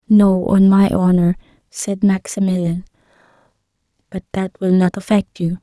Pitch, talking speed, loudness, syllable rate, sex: 190 Hz, 130 wpm, -16 LUFS, 4.6 syllables/s, female